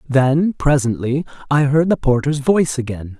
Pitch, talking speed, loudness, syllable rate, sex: 140 Hz, 150 wpm, -17 LUFS, 4.6 syllables/s, male